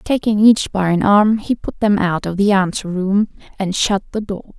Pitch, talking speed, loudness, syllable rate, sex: 200 Hz, 210 wpm, -16 LUFS, 4.5 syllables/s, female